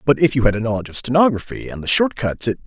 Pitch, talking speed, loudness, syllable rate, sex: 125 Hz, 295 wpm, -18 LUFS, 7.3 syllables/s, male